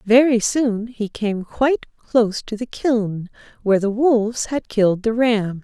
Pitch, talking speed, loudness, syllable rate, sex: 225 Hz, 170 wpm, -19 LUFS, 4.4 syllables/s, female